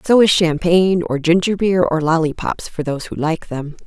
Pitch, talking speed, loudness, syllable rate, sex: 170 Hz, 185 wpm, -17 LUFS, 5.2 syllables/s, female